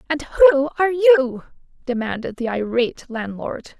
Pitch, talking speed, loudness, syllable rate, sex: 270 Hz, 125 wpm, -19 LUFS, 4.6 syllables/s, female